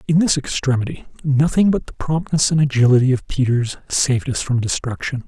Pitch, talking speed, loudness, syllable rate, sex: 135 Hz, 170 wpm, -18 LUFS, 5.5 syllables/s, male